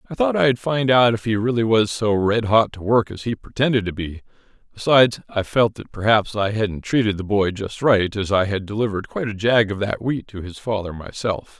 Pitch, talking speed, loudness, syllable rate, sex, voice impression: 110 Hz, 235 wpm, -20 LUFS, 5.4 syllables/s, male, masculine, slightly middle-aged, slightly thick, cool, sincere, slightly elegant, slightly kind